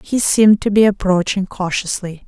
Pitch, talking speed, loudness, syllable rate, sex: 195 Hz, 160 wpm, -15 LUFS, 5.1 syllables/s, female